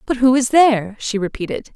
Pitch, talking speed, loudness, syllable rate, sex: 240 Hz, 205 wpm, -17 LUFS, 5.7 syllables/s, female